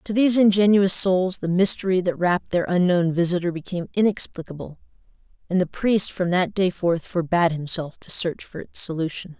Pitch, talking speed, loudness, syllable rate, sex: 180 Hz, 170 wpm, -21 LUFS, 5.5 syllables/s, female